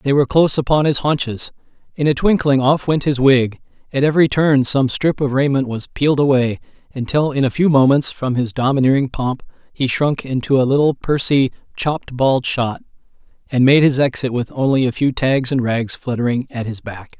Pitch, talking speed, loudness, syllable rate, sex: 135 Hz, 195 wpm, -17 LUFS, 5.3 syllables/s, male